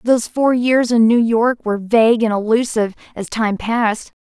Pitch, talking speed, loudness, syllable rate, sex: 230 Hz, 185 wpm, -16 LUFS, 5.3 syllables/s, female